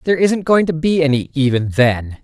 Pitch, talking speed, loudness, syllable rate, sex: 150 Hz, 215 wpm, -16 LUFS, 5.3 syllables/s, male